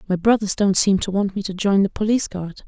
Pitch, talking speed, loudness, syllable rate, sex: 195 Hz, 270 wpm, -19 LUFS, 6.1 syllables/s, female